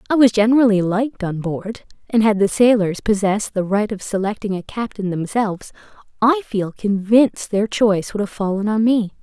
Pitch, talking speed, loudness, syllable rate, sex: 210 Hz, 180 wpm, -18 LUFS, 5.4 syllables/s, female